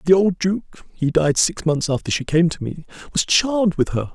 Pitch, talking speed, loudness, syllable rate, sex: 170 Hz, 205 wpm, -19 LUFS, 4.9 syllables/s, male